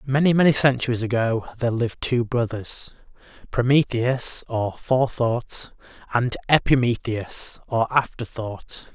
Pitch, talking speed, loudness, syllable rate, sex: 120 Hz, 100 wpm, -22 LUFS, 4.3 syllables/s, male